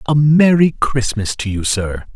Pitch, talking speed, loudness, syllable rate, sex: 130 Hz, 165 wpm, -15 LUFS, 4.2 syllables/s, male